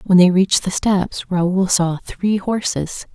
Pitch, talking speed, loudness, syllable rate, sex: 185 Hz, 170 wpm, -18 LUFS, 3.7 syllables/s, female